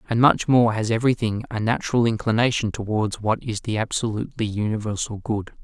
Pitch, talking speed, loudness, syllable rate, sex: 110 Hz, 160 wpm, -22 LUFS, 5.8 syllables/s, male